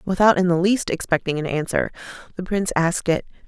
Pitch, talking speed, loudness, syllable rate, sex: 180 Hz, 190 wpm, -21 LUFS, 6.3 syllables/s, female